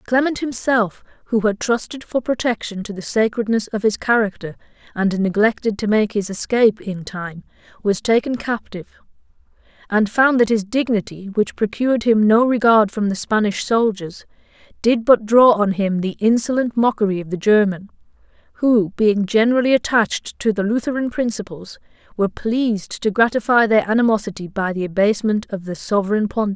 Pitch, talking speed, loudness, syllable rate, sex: 215 Hz, 160 wpm, -18 LUFS, 5.3 syllables/s, female